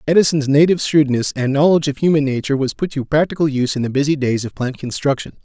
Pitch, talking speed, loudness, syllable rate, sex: 140 Hz, 220 wpm, -17 LUFS, 6.9 syllables/s, male